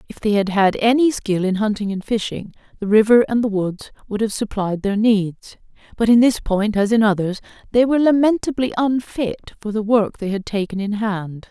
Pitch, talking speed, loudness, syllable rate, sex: 215 Hz, 205 wpm, -19 LUFS, 5.2 syllables/s, female